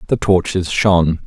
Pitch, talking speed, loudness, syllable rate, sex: 90 Hz, 145 wpm, -15 LUFS, 4.9 syllables/s, male